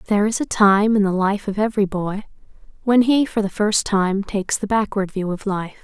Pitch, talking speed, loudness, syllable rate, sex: 205 Hz, 225 wpm, -19 LUFS, 5.4 syllables/s, female